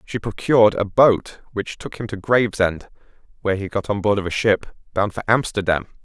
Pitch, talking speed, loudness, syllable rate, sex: 105 Hz, 200 wpm, -20 LUFS, 5.4 syllables/s, male